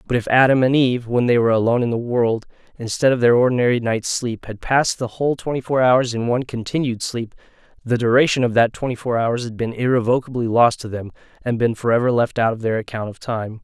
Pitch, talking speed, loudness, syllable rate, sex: 120 Hz, 235 wpm, -19 LUFS, 5.8 syllables/s, male